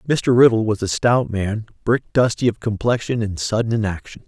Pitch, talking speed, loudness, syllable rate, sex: 110 Hz, 195 wpm, -19 LUFS, 5.2 syllables/s, male